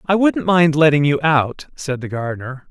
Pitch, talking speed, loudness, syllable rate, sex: 150 Hz, 200 wpm, -17 LUFS, 4.9 syllables/s, male